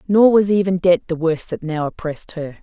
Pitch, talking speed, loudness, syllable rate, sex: 175 Hz, 230 wpm, -18 LUFS, 5.4 syllables/s, female